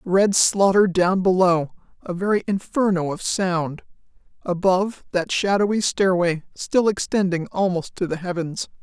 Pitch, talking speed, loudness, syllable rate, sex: 185 Hz, 130 wpm, -21 LUFS, 4.4 syllables/s, female